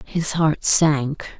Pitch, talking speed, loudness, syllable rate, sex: 150 Hz, 130 wpm, -19 LUFS, 2.5 syllables/s, female